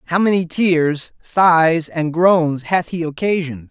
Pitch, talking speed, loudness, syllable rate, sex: 165 Hz, 145 wpm, -17 LUFS, 3.5 syllables/s, male